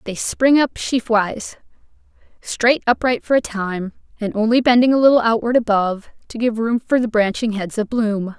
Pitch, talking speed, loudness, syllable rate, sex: 225 Hz, 185 wpm, -18 LUFS, 4.9 syllables/s, female